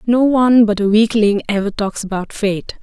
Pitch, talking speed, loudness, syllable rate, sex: 215 Hz, 190 wpm, -15 LUFS, 5.1 syllables/s, female